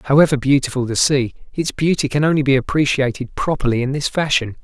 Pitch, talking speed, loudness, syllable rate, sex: 140 Hz, 180 wpm, -18 LUFS, 6.2 syllables/s, male